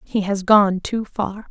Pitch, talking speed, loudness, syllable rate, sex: 200 Hz, 200 wpm, -19 LUFS, 3.6 syllables/s, female